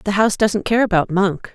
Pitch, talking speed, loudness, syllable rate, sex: 200 Hz, 230 wpm, -17 LUFS, 5.4 syllables/s, female